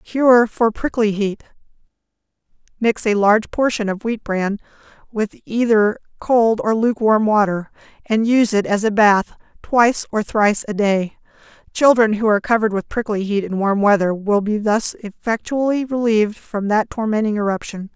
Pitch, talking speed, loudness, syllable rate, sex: 215 Hz, 155 wpm, -18 LUFS, 5.0 syllables/s, female